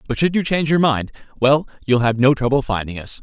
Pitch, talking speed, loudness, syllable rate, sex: 135 Hz, 225 wpm, -18 LUFS, 6.2 syllables/s, male